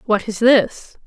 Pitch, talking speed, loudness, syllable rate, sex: 225 Hz, 170 wpm, -16 LUFS, 3.4 syllables/s, female